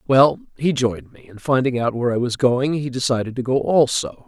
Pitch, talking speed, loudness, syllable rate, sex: 130 Hz, 225 wpm, -20 LUFS, 5.6 syllables/s, male